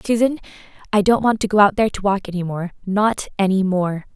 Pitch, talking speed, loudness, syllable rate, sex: 200 Hz, 200 wpm, -19 LUFS, 5.8 syllables/s, female